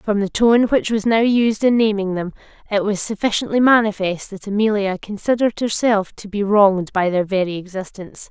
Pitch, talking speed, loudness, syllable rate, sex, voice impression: 205 Hz, 180 wpm, -18 LUFS, 5.4 syllables/s, female, very feminine, slightly young, slightly adult-like, very thin, slightly tensed, slightly weak, very bright, hard, very clear, very fluent, cute, intellectual, refreshing, very sincere, very calm, friendly, very reassuring, very unique, very elegant, slightly wild, very sweet, lively, very kind, very modest